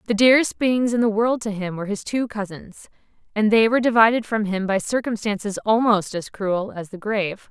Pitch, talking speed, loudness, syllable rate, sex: 215 Hz, 210 wpm, -21 LUFS, 5.6 syllables/s, female